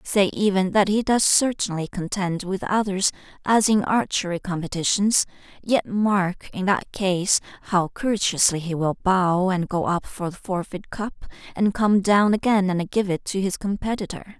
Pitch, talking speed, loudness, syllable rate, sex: 195 Hz, 165 wpm, -22 LUFS, 4.4 syllables/s, female